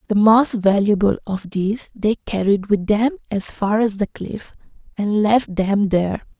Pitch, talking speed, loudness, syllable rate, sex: 210 Hz, 170 wpm, -19 LUFS, 4.2 syllables/s, female